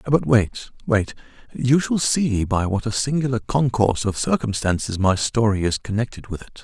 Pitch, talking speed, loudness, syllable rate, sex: 115 Hz, 165 wpm, -21 LUFS, 4.9 syllables/s, male